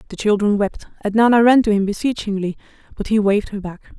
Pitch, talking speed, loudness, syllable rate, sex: 210 Hz, 210 wpm, -18 LUFS, 6.4 syllables/s, female